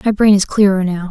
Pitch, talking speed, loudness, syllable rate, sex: 195 Hz, 270 wpm, -13 LUFS, 6.1 syllables/s, female